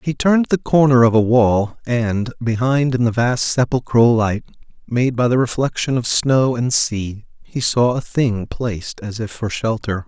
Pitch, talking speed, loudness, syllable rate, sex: 120 Hz, 185 wpm, -17 LUFS, 4.4 syllables/s, male